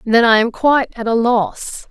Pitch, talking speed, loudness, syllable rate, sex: 235 Hz, 220 wpm, -15 LUFS, 4.5 syllables/s, female